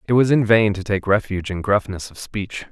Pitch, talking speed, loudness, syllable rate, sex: 100 Hz, 245 wpm, -19 LUFS, 5.4 syllables/s, male